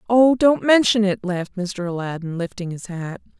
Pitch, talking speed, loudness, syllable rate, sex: 200 Hz, 175 wpm, -20 LUFS, 5.0 syllables/s, female